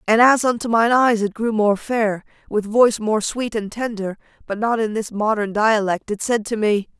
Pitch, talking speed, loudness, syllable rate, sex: 220 Hz, 215 wpm, -19 LUFS, 4.8 syllables/s, female